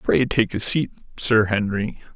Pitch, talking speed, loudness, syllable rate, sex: 110 Hz, 165 wpm, -21 LUFS, 4.2 syllables/s, male